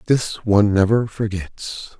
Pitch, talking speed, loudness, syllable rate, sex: 105 Hz, 120 wpm, -19 LUFS, 4.0 syllables/s, male